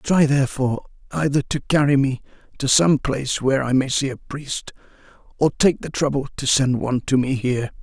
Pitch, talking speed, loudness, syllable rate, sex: 135 Hz, 190 wpm, -20 LUFS, 5.6 syllables/s, male